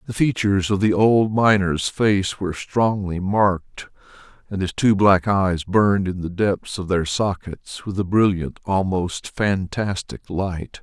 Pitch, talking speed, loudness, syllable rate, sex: 95 Hz, 155 wpm, -20 LUFS, 4.0 syllables/s, male